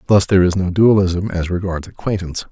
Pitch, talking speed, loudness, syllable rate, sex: 95 Hz, 190 wpm, -17 LUFS, 6.6 syllables/s, male